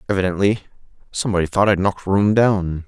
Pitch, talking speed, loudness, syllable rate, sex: 95 Hz, 145 wpm, -18 LUFS, 6.2 syllables/s, male